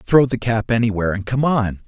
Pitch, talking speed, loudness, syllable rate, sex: 115 Hz, 225 wpm, -19 LUFS, 5.8 syllables/s, male